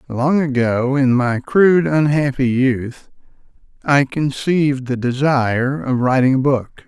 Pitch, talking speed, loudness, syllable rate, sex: 135 Hz, 130 wpm, -16 LUFS, 4.1 syllables/s, male